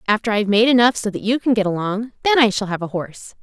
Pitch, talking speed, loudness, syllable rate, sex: 220 Hz, 300 wpm, -18 LUFS, 6.8 syllables/s, female